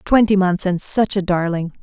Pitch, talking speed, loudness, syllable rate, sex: 190 Hz, 195 wpm, -17 LUFS, 4.7 syllables/s, female